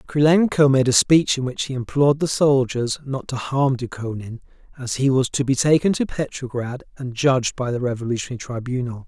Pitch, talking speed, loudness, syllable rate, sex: 130 Hz, 185 wpm, -20 LUFS, 5.5 syllables/s, male